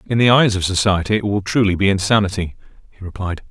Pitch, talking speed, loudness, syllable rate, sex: 100 Hz, 205 wpm, -17 LUFS, 6.3 syllables/s, male